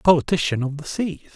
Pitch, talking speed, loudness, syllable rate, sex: 155 Hz, 220 wpm, -22 LUFS, 6.3 syllables/s, male